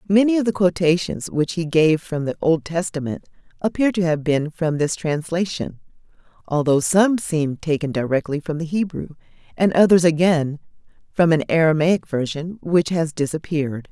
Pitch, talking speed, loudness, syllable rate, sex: 165 Hz, 155 wpm, -20 LUFS, 4.9 syllables/s, female